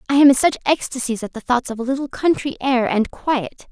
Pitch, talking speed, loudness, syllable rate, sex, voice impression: 255 Hz, 245 wpm, -19 LUFS, 5.7 syllables/s, female, feminine, slightly gender-neutral, young, tensed, powerful, bright, clear, fluent, cute, friendly, unique, lively, slightly kind